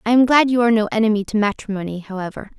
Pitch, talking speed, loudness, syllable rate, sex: 220 Hz, 230 wpm, -18 LUFS, 7.5 syllables/s, female